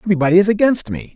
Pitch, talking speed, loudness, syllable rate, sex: 185 Hz, 210 wpm, -15 LUFS, 8.7 syllables/s, male